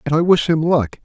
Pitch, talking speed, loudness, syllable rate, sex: 155 Hz, 290 wpm, -16 LUFS, 5.5 syllables/s, male